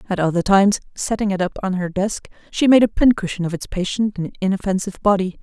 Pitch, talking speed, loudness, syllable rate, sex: 195 Hz, 210 wpm, -19 LUFS, 6.3 syllables/s, female